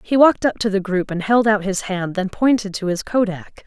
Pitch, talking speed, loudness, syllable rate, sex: 205 Hz, 260 wpm, -19 LUFS, 5.3 syllables/s, female